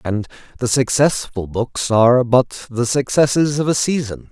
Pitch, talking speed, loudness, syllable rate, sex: 125 Hz, 155 wpm, -17 LUFS, 4.4 syllables/s, male